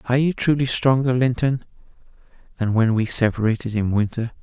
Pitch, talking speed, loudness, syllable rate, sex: 120 Hz, 150 wpm, -20 LUFS, 5.7 syllables/s, male